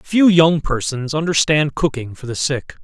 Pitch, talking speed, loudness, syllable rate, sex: 150 Hz, 170 wpm, -17 LUFS, 4.4 syllables/s, male